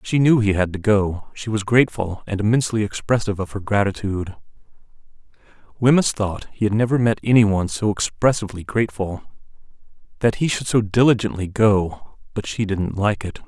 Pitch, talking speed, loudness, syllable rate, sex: 105 Hz, 155 wpm, -20 LUFS, 5.7 syllables/s, male